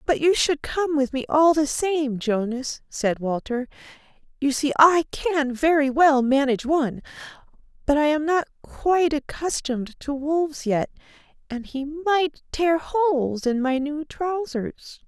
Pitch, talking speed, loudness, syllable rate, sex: 290 Hz, 150 wpm, -22 LUFS, 4.2 syllables/s, female